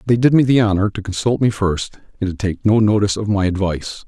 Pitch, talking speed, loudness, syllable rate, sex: 105 Hz, 250 wpm, -17 LUFS, 6.3 syllables/s, male